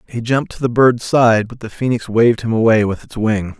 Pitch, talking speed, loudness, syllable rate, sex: 115 Hz, 250 wpm, -16 LUFS, 5.6 syllables/s, male